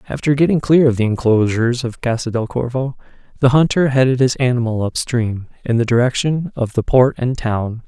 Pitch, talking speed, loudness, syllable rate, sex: 125 Hz, 185 wpm, -17 LUFS, 5.4 syllables/s, male